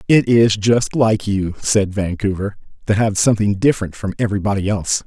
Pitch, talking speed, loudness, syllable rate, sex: 105 Hz, 165 wpm, -17 LUFS, 5.6 syllables/s, male